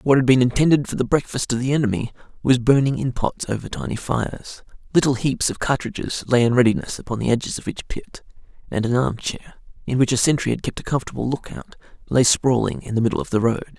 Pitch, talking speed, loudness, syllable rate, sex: 125 Hz, 220 wpm, -21 LUFS, 6.2 syllables/s, male